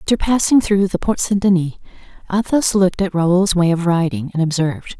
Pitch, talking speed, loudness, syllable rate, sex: 185 Hz, 190 wpm, -17 LUFS, 5.8 syllables/s, female